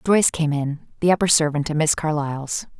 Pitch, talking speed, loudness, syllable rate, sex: 155 Hz, 170 wpm, -21 LUFS, 6.0 syllables/s, female